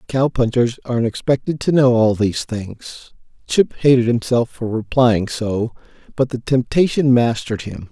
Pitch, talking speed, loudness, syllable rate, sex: 120 Hz, 150 wpm, -18 LUFS, 4.8 syllables/s, male